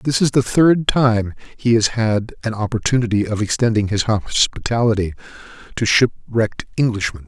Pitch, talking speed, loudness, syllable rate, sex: 115 Hz, 140 wpm, -18 LUFS, 4.9 syllables/s, male